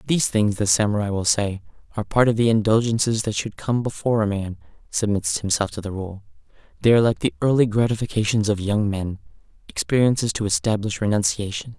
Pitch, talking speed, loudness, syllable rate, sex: 110 Hz, 180 wpm, -21 LUFS, 6.1 syllables/s, male